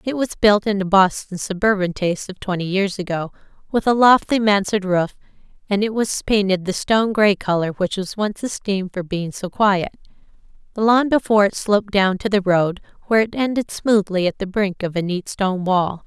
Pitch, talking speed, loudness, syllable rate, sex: 200 Hz, 200 wpm, -19 LUFS, 5.3 syllables/s, female